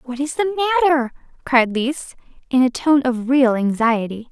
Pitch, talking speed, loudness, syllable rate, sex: 265 Hz, 165 wpm, -18 LUFS, 4.5 syllables/s, female